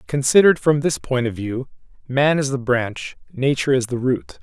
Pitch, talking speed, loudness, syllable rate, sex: 135 Hz, 190 wpm, -19 LUFS, 5.1 syllables/s, male